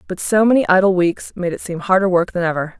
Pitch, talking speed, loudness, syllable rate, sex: 185 Hz, 260 wpm, -17 LUFS, 6.2 syllables/s, female